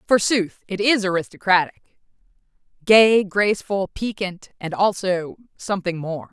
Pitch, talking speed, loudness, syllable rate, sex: 190 Hz, 105 wpm, -20 LUFS, 4.4 syllables/s, female